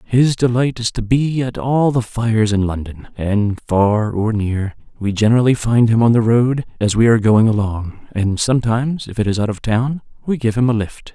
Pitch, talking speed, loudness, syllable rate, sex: 115 Hz, 215 wpm, -17 LUFS, 5.0 syllables/s, male